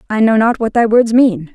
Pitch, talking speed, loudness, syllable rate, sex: 230 Hz, 270 wpm, -12 LUFS, 5.2 syllables/s, female